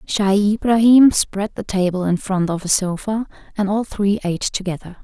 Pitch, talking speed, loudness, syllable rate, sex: 200 Hz, 180 wpm, -18 LUFS, 4.9 syllables/s, female